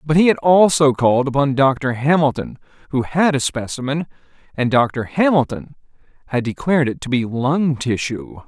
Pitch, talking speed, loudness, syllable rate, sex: 135 Hz, 155 wpm, -17 LUFS, 4.9 syllables/s, male